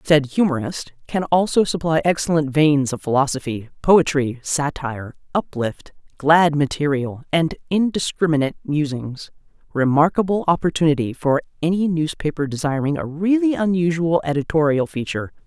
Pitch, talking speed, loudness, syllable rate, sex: 155 Hz, 110 wpm, -20 LUFS, 5.1 syllables/s, female